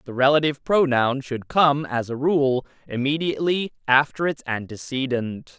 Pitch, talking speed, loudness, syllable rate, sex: 140 Hz, 130 wpm, -22 LUFS, 4.7 syllables/s, male